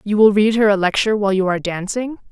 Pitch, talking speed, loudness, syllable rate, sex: 205 Hz, 260 wpm, -17 LUFS, 7.1 syllables/s, female